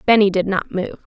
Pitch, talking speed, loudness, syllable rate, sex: 195 Hz, 210 wpm, -18 LUFS, 5.2 syllables/s, female